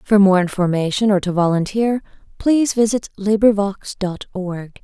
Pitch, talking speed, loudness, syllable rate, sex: 200 Hz, 135 wpm, -18 LUFS, 4.9 syllables/s, female